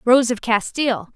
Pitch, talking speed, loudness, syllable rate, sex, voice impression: 235 Hz, 155 wpm, -19 LUFS, 4.8 syllables/s, female, very feminine, slightly young, slightly adult-like, thin, slightly tensed, slightly powerful, bright, slightly hard, very clear, very fluent, cute, slightly intellectual, very refreshing, sincere, calm, very friendly, reassuring, unique, wild, sweet, very lively, kind, slightly light